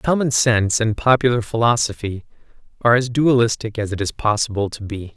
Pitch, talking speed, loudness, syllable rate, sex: 115 Hz, 165 wpm, -19 LUFS, 5.9 syllables/s, male